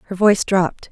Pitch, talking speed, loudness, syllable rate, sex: 190 Hz, 195 wpm, -17 LUFS, 7.3 syllables/s, female